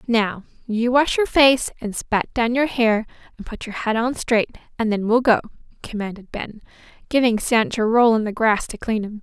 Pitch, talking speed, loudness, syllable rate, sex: 230 Hz, 210 wpm, -20 LUFS, 4.7 syllables/s, female